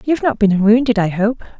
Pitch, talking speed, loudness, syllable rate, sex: 225 Hz, 265 wpm, -15 LUFS, 5.8 syllables/s, female